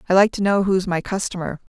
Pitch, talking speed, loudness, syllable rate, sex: 190 Hz, 240 wpm, -20 LUFS, 6.2 syllables/s, female